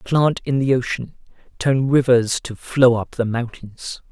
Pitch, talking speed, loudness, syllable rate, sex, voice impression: 125 Hz, 160 wpm, -19 LUFS, 4.1 syllables/s, male, masculine, adult-like, tensed, slightly powerful, bright, clear, fluent, intellectual, refreshing, friendly, slightly unique, slightly wild, lively, light